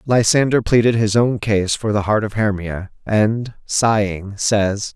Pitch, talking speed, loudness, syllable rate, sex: 105 Hz, 155 wpm, -18 LUFS, 4.0 syllables/s, male